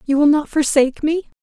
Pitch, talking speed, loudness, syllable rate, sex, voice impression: 295 Hz, 210 wpm, -17 LUFS, 6.0 syllables/s, female, feminine, adult-like, bright, soft, fluent, calm, friendly, reassuring, slightly elegant, kind